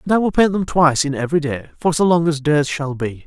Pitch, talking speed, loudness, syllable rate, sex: 155 Hz, 295 wpm, -18 LUFS, 6.3 syllables/s, male